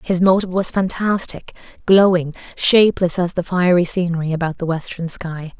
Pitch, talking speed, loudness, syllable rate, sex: 175 Hz, 150 wpm, -17 LUFS, 5.2 syllables/s, female